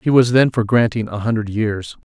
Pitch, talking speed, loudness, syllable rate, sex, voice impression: 110 Hz, 225 wpm, -17 LUFS, 5.1 syllables/s, male, very masculine, very adult-like, very middle-aged, very thick, tensed, slightly powerful, slightly dark, slightly hard, slightly muffled, slightly fluent, cool, slightly intellectual, sincere, slightly calm, mature, slightly friendly, reassuring, slightly unique, wild, kind, modest